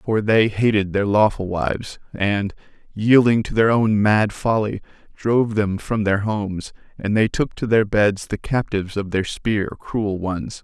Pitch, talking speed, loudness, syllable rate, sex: 105 Hz, 175 wpm, -20 LUFS, 4.2 syllables/s, male